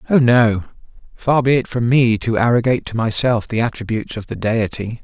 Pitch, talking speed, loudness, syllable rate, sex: 115 Hz, 190 wpm, -17 LUFS, 5.6 syllables/s, male